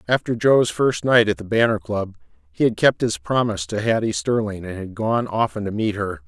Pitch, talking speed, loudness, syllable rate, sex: 110 Hz, 220 wpm, -20 LUFS, 5.2 syllables/s, male